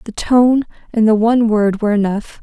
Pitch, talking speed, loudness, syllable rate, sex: 220 Hz, 200 wpm, -14 LUFS, 5.4 syllables/s, female